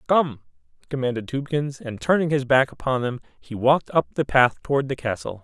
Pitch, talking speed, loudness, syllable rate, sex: 130 Hz, 190 wpm, -23 LUFS, 5.8 syllables/s, male